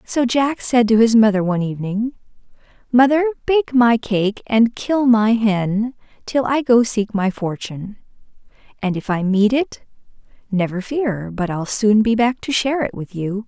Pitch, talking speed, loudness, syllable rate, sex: 225 Hz, 175 wpm, -18 LUFS, 4.5 syllables/s, female